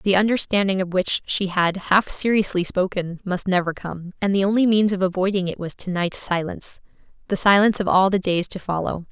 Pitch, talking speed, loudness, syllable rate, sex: 190 Hz, 205 wpm, -21 LUFS, 5.5 syllables/s, female